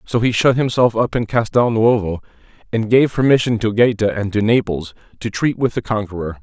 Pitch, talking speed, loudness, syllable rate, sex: 110 Hz, 195 wpm, -17 LUFS, 5.4 syllables/s, male